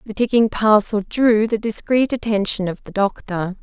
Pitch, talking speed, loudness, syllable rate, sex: 215 Hz, 165 wpm, -19 LUFS, 4.8 syllables/s, female